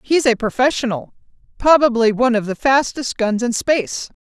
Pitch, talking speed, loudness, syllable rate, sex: 240 Hz, 140 wpm, -17 LUFS, 5.3 syllables/s, female